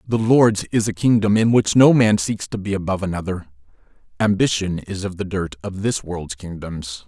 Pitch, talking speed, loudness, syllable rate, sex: 100 Hz, 195 wpm, -19 LUFS, 5.0 syllables/s, male